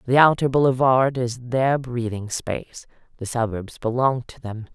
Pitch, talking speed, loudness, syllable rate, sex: 125 Hz, 150 wpm, -21 LUFS, 4.5 syllables/s, female